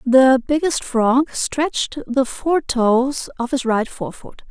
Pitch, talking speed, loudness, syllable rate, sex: 260 Hz, 145 wpm, -18 LUFS, 3.7 syllables/s, female